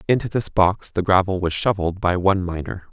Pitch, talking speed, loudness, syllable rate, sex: 95 Hz, 205 wpm, -20 LUFS, 6.0 syllables/s, male